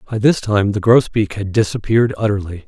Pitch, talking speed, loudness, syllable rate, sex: 105 Hz, 180 wpm, -16 LUFS, 5.7 syllables/s, male